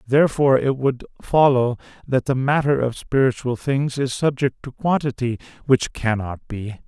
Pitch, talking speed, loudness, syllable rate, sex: 130 Hz, 150 wpm, -20 LUFS, 4.7 syllables/s, male